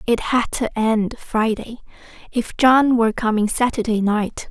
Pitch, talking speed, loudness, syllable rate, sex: 230 Hz, 145 wpm, -19 LUFS, 4.3 syllables/s, female